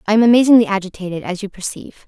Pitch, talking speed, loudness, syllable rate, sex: 205 Hz, 200 wpm, -16 LUFS, 7.6 syllables/s, female